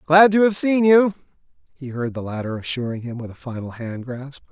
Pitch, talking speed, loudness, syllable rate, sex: 145 Hz, 215 wpm, -20 LUFS, 5.4 syllables/s, male